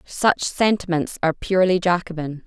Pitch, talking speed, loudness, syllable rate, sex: 175 Hz, 120 wpm, -21 LUFS, 5.2 syllables/s, female